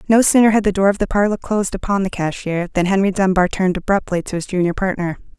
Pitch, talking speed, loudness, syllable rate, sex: 190 Hz, 235 wpm, -18 LUFS, 6.6 syllables/s, female